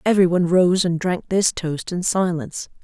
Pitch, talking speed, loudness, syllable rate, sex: 180 Hz, 170 wpm, -20 LUFS, 5.1 syllables/s, female